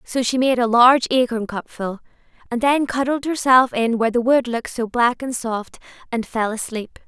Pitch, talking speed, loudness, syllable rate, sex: 240 Hz, 205 wpm, -19 LUFS, 4.9 syllables/s, female